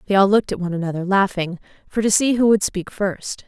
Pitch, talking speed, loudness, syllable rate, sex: 195 Hz, 240 wpm, -19 LUFS, 6.3 syllables/s, female